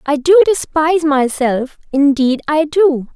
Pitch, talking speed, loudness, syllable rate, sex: 300 Hz, 115 wpm, -14 LUFS, 4.0 syllables/s, female